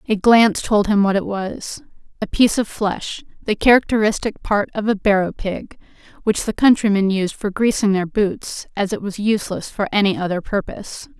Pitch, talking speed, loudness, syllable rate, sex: 205 Hz, 175 wpm, -18 LUFS, 5.1 syllables/s, female